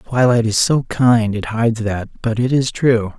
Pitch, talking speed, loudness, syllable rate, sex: 115 Hz, 225 wpm, -16 LUFS, 4.8 syllables/s, male